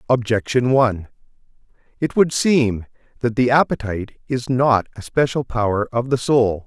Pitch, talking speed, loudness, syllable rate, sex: 120 Hz, 145 wpm, -19 LUFS, 4.7 syllables/s, male